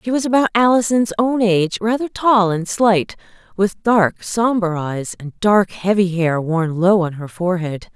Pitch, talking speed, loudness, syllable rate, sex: 195 Hz, 175 wpm, -17 LUFS, 4.4 syllables/s, female